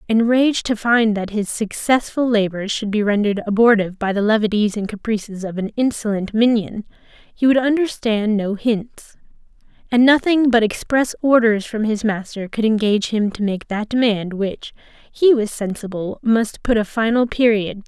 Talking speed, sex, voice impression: 175 wpm, female, feminine, slightly adult-like, slightly soft, slightly intellectual, slightly calm